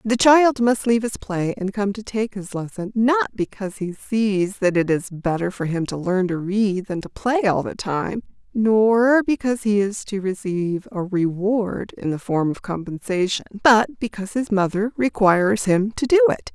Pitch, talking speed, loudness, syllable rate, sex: 205 Hz, 195 wpm, -21 LUFS, 4.7 syllables/s, female